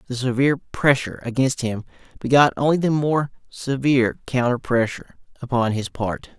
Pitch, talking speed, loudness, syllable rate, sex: 130 Hz, 140 wpm, -21 LUFS, 5.3 syllables/s, male